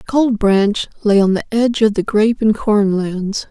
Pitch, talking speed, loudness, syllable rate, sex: 210 Hz, 205 wpm, -15 LUFS, 4.6 syllables/s, female